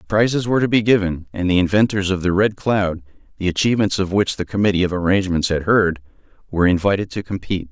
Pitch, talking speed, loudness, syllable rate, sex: 95 Hz, 200 wpm, -18 LUFS, 6.7 syllables/s, male